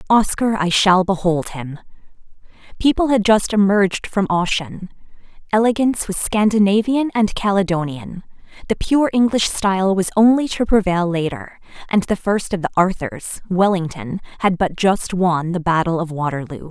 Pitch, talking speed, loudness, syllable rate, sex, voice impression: 190 Hz, 145 wpm, -18 LUFS, 4.9 syllables/s, female, feminine, adult-like, tensed, powerful, bright, slightly soft, clear, fluent, slightly intellectual, calm, friendly, elegant, lively